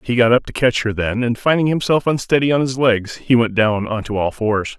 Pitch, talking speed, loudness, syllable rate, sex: 120 Hz, 265 wpm, -17 LUFS, 5.3 syllables/s, male